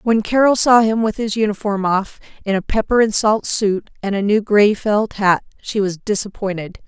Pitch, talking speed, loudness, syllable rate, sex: 210 Hz, 200 wpm, -17 LUFS, 4.9 syllables/s, female